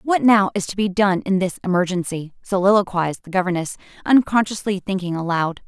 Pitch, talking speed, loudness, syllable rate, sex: 190 Hz, 160 wpm, -20 LUFS, 5.8 syllables/s, female